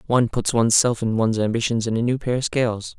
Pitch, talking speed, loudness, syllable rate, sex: 115 Hz, 260 wpm, -21 LUFS, 6.9 syllables/s, male